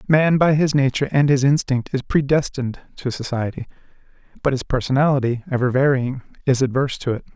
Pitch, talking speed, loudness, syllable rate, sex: 135 Hz, 165 wpm, -20 LUFS, 6.1 syllables/s, male